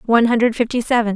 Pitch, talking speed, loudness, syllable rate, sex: 230 Hz, 205 wpm, -17 LUFS, 6.9 syllables/s, female